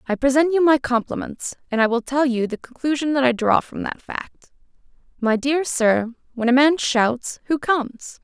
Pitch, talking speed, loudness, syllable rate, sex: 265 Hz, 195 wpm, -20 LUFS, 4.8 syllables/s, female